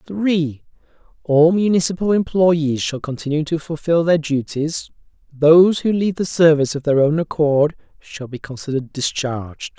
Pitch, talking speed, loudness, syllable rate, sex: 155 Hz, 140 wpm, -18 LUFS, 5.1 syllables/s, male